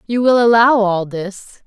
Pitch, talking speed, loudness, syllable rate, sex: 215 Hz, 180 wpm, -13 LUFS, 4.0 syllables/s, female